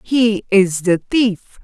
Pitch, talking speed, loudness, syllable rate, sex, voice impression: 205 Hz, 145 wpm, -16 LUFS, 2.7 syllables/s, female, very feminine, very young, very thin, slightly tensed, slightly weak, slightly bright, very soft, clear, fluent, raspy, very cute, very intellectual, very refreshing, sincere, very calm, very friendly, very reassuring, very unique, very elegant, slightly wild, very sweet, lively, very kind, modest, light